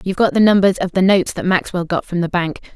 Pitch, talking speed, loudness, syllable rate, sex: 185 Hz, 285 wpm, -16 LUFS, 6.9 syllables/s, female